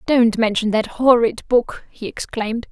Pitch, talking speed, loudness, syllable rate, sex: 230 Hz, 155 wpm, -18 LUFS, 4.5 syllables/s, female